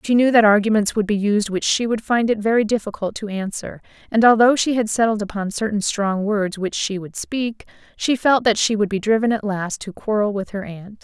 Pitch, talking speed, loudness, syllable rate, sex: 215 Hz, 235 wpm, -19 LUFS, 5.3 syllables/s, female